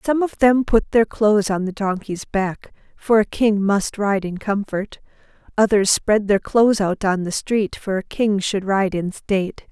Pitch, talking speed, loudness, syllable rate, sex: 205 Hz, 200 wpm, -19 LUFS, 4.4 syllables/s, female